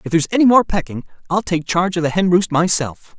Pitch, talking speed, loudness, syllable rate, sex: 175 Hz, 245 wpm, -17 LUFS, 6.3 syllables/s, male